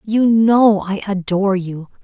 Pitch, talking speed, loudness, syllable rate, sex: 200 Hz, 150 wpm, -15 LUFS, 3.9 syllables/s, female